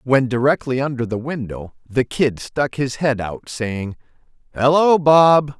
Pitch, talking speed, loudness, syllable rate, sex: 130 Hz, 150 wpm, -18 LUFS, 4.0 syllables/s, male